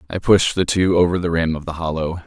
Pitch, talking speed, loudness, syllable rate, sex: 85 Hz, 265 wpm, -18 LUFS, 5.9 syllables/s, male